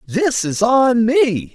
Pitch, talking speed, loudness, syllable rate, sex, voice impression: 235 Hz, 155 wpm, -15 LUFS, 2.8 syllables/s, male, very masculine, very adult-like, very middle-aged, very thick, very tensed, very powerful, very bright, soft, very clear, very fluent, raspy, very cool, intellectual, sincere, slightly calm, very mature, very friendly, very reassuring, very unique, slightly elegant, very wild, sweet, very lively, kind, very intense